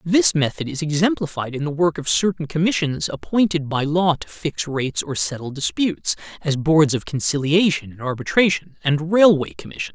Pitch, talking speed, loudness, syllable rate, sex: 155 Hz, 170 wpm, -20 LUFS, 5.2 syllables/s, male